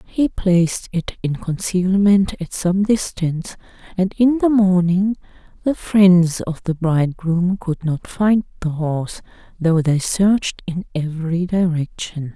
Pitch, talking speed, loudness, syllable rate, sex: 180 Hz, 135 wpm, -18 LUFS, 4.0 syllables/s, female